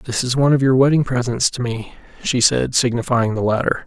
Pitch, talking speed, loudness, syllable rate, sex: 125 Hz, 215 wpm, -17 LUFS, 5.7 syllables/s, male